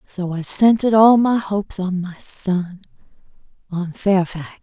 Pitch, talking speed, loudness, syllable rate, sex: 190 Hz, 130 wpm, -18 LUFS, 4.4 syllables/s, female